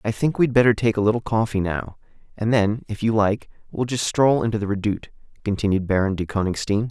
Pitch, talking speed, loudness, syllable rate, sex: 110 Hz, 210 wpm, -22 LUFS, 5.0 syllables/s, male